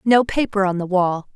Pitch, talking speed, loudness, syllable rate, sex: 200 Hz, 220 wpm, -19 LUFS, 4.9 syllables/s, female